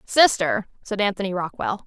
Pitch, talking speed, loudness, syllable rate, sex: 195 Hz, 130 wpm, -22 LUFS, 5.0 syllables/s, female